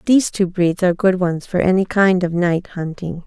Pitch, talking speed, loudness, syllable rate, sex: 180 Hz, 220 wpm, -18 LUFS, 5.1 syllables/s, female